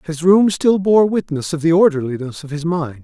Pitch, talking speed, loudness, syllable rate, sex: 165 Hz, 215 wpm, -16 LUFS, 5.2 syllables/s, male